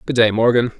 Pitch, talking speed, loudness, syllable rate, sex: 115 Hz, 230 wpm, -16 LUFS, 6.3 syllables/s, male